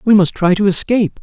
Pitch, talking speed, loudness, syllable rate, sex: 200 Hz, 245 wpm, -14 LUFS, 6.3 syllables/s, male